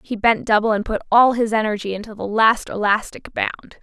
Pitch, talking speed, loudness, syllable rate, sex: 215 Hz, 205 wpm, -19 LUFS, 5.7 syllables/s, female